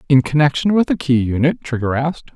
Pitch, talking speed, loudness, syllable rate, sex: 140 Hz, 205 wpm, -17 LUFS, 6.3 syllables/s, male